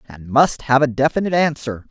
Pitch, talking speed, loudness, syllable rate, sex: 135 Hz, 190 wpm, -17 LUFS, 5.8 syllables/s, male